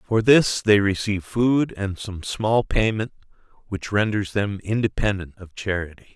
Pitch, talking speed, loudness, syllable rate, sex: 105 Hz, 145 wpm, -22 LUFS, 4.5 syllables/s, male